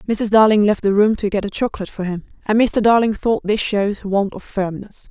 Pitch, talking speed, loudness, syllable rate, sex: 205 Hz, 235 wpm, -18 LUFS, 5.7 syllables/s, female